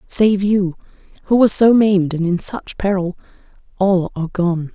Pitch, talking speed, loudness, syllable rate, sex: 190 Hz, 140 wpm, -16 LUFS, 5.0 syllables/s, female